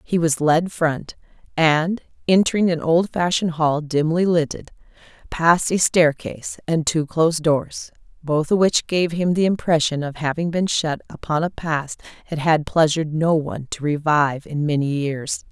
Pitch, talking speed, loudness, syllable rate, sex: 160 Hz, 160 wpm, -20 LUFS, 4.7 syllables/s, female